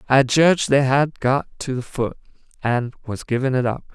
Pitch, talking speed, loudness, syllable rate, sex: 130 Hz, 200 wpm, -20 LUFS, 5.0 syllables/s, male